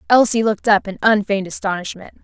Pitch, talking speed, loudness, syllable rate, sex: 205 Hz, 160 wpm, -17 LUFS, 6.4 syllables/s, female